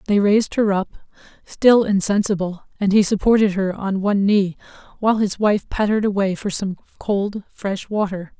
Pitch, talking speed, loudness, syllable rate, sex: 200 Hz, 165 wpm, -19 LUFS, 5.2 syllables/s, female